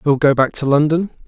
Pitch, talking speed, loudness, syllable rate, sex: 145 Hz, 235 wpm, -16 LUFS, 5.9 syllables/s, male